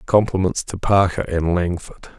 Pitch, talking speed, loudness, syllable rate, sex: 90 Hz, 135 wpm, -20 LUFS, 4.8 syllables/s, male